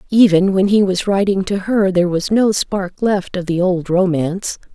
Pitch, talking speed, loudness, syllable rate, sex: 190 Hz, 200 wpm, -16 LUFS, 4.8 syllables/s, female